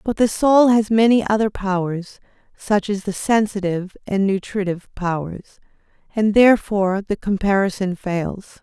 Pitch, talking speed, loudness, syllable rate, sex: 200 Hz, 130 wpm, -19 LUFS, 4.9 syllables/s, female